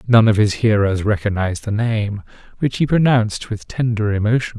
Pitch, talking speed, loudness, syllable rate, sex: 110 Hz, 170 wpm, -18 LUFS, 5.4 syllables/s, male